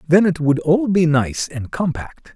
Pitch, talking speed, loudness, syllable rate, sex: 160 Hz, 205 wpm, -18 LUFS, 4.1 syllables/s, male